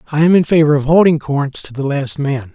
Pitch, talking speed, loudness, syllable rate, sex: 150 Hz, 260 wpm, -14 LUFS, 6.1 syllables/s, male